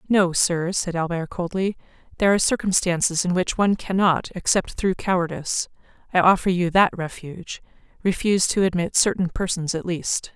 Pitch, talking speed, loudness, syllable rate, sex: 180 Hz, 145 wpm, -22 LUFS, 5.4 syllables/s, female